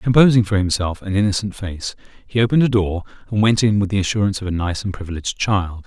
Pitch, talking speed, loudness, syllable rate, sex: 100 Hz, 225 wpm, -19 LUFS, 6.7 syllables/s, male